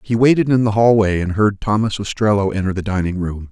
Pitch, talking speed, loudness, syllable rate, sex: 105 Hz, 220 wpm, -17 LUFS, 5.9 syllables/s, male